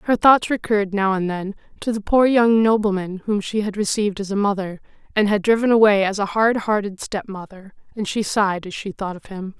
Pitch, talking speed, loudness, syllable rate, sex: 205 Hz, 225 wpm, -20 LUFS, 5.6 syllables/s, female